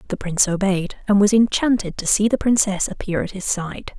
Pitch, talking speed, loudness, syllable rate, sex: 200 Hz, 210 wpm, -19 LUFS, 5.5 syllables/s, female